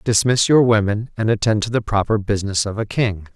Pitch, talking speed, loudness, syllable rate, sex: 110 Hz, 215 wpm, -18 LUFS, 5.7 syllables/s, male